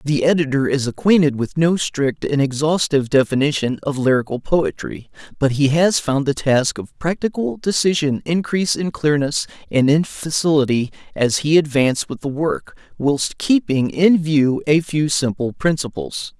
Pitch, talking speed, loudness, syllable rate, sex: 145 Hz, 155 wpm, -18 LUFS, 4.7 syllables/s, male